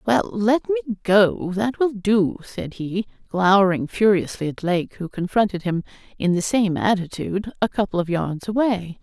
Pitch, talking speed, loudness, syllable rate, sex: 200 Hz, 165 wpm, -21 LUFS, 4.6 syllables/s, female